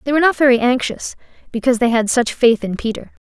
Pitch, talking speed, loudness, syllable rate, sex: 245 Hz, 220 wpm, -16 LUFS, 6.6 syllables/s, female